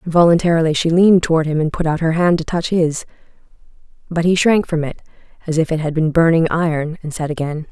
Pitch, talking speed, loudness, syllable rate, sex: 165 Hz, 220 wpm, -16 LUFS, 6.3 syllables/s, female